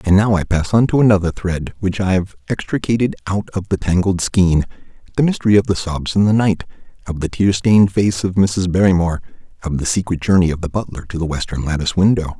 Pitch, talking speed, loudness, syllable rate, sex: 95 Hz, 220 wpm, -17 LUFS, 6.0 syllables/s, male